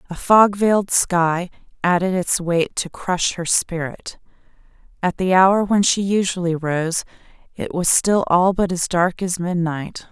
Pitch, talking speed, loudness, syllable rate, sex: 180 Hz, 160 wpm, -19 LUFS, 4.0 syllables/s, female